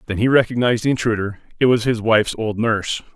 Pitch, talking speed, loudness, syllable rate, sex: 115 Hz, 210 wpm, -18 LUFS, 6.7 syllables/s, male